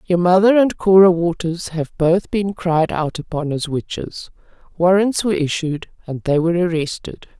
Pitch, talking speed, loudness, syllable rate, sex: 175 Hz, 160 wpm, -17 LUFS, 4.7 syllables/s, female